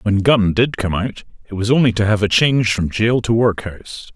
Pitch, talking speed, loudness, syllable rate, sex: 110 Hz, 230 wpm, -16 LUFS, 5.3 syllables/s, male